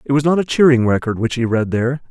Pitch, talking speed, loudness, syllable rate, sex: 130 Hz, 285 wpm, -16 LUFS, 6.7 syllables/s, male